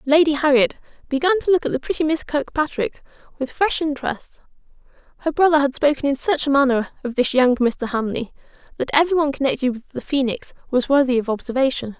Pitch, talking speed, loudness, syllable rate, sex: 280 Hz, 185 wpm, -20 LUFS, 6.1 syllables/s, female